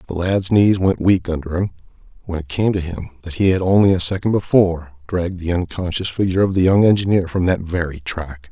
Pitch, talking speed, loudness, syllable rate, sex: 90 Hz, 220 wpm, -18 LUFS, 5.9 syllables/s, male